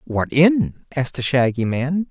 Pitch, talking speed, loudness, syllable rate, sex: 140 Hz, 170 wpm, -19 LUFS, 4.4 syllables/s, male